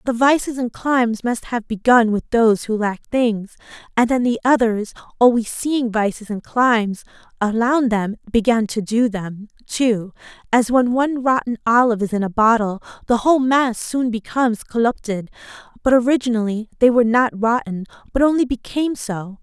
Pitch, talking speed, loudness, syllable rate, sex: 230 Hz, 160 wpm, -18 LUFS, 5.1 syllables/s, female